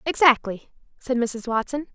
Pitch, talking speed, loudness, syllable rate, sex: 255 Hz, 125 wpm, -22 LUFS, 4.6 syllables/s, female